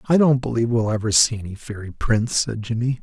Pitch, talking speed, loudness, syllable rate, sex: 115 Hz, 220 wpm, -20 LUFS, 6.1 syllables/s, male